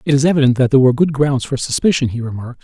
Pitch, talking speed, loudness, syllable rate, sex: 135 Hz, 275 wpm, -15 LUFS, 8.0 syllables/s, male